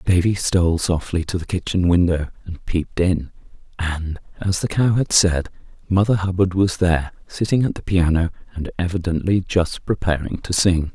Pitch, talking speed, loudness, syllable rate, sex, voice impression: 90 Hz, 165 wpm, -20 LUFS, 5.0 syllables/s, male, very masculine, very middle-aged, thick, relaxed, weak, slightly bright, very soft, muffled, slightly fluent, raspy, slightly cool, very intellectual, slightly refreshing, sincere, very calm, very mature, friendly, reassuring, very unique, slightly elegant, slightly wild, sweet, slightly lively, very kind, very modest